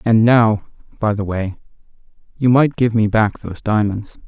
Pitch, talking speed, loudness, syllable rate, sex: 110 Hz, 170 wpm, -17 LUFS, 4.7 syllables/s, male